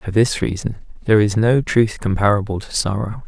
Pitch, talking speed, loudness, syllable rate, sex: 105 Hz, 185 wpm, -18 LUFS, 5.3 syllables/s, male